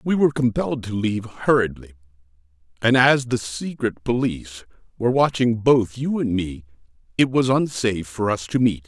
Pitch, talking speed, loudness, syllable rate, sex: 115 Hz, 160 wpm, -21 LUFS, 5.3 syllables/s, male